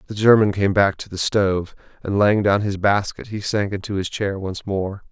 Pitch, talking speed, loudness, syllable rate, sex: 100 Hz, 225 wpm, -20 LUFS, 5.0 syllables/s, male